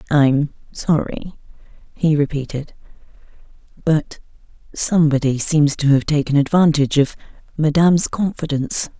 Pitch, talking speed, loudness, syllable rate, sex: 150 Hz, 95 wpm, -18 LUFS, 4.9 syllables/s, female